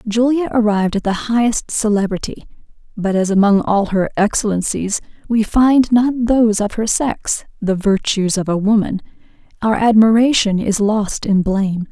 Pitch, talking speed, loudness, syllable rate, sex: 215 Hz, 150 wpm, -16 LUFS, 4.7 syllables/s, female